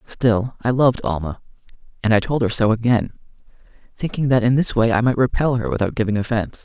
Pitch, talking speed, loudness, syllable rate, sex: 115 Hz, 200 wpm, -19 LUFS, 6.2 syllables/s, male